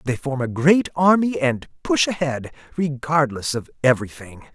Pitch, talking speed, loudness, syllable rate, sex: 140 Hz, 145 wpm, -20 LUFS, 4.6 syllables/s, male